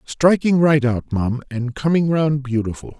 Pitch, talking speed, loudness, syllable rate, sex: 135 Hz, 160 wpm, -19 LUFS, 4.3 syllables/s, male